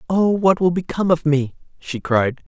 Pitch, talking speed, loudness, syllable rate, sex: 165 Hz, 190 wpm, -19 LUFS, 5.0 syllables/s, male